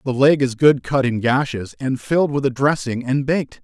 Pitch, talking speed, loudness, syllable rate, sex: 135 Hz, 230 wpm, -19 LUFS, 5.2 syllables/s, male